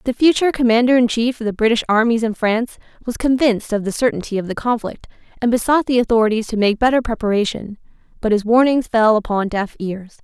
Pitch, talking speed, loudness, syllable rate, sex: 230 Hz, 195 wpm, -17 LUFS, 6.2 syllables/s, female